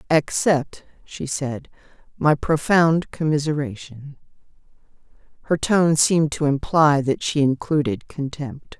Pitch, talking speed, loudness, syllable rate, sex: 145 Hz, 100 wpm, -20 LUFS, 3.9 syllables/s, female